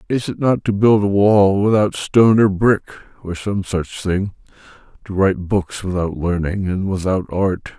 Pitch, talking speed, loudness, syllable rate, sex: 100 Hz, 175 wpm, -17 LUFS, 4.5 syllables/s, male